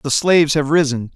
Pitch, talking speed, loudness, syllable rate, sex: 150 Hz, 210 wpm, -15 LUFS, 5.4 syllables/s, male